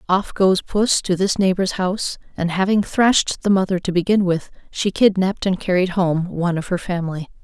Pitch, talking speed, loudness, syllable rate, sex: 185 Hz, 195 wpm, -19 LUFS, 5.3 syllables/s, female